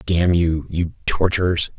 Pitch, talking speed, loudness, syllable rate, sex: 85 Hz, 135 wpm, -20 LUFS, 4.0 syllables/s, male